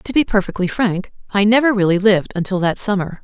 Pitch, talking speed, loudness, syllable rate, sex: 200 Hz, 205 wpm, -17 LUFS, 6.0 syllables/s, female